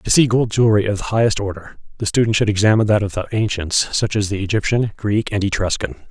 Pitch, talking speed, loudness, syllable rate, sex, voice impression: 105 Hz, 225 wpm, -18 LUFS, 6.6 syllables/s, male, masculine, adult-like, slightly thick, slightly tensed, hard, clear, fluent, cool, intellectual, slightly mature, slightly friendly, elegant, slightly wild, strict, slightly sharp